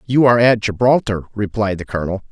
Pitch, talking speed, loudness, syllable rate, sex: 105 Hz, 180 wpm, -16 LUFS, 6.3 syllables/s, male